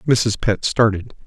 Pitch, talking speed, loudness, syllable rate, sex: 110 Hz, 140 wpm, -18 LUFS, 4.1 syllables/s, male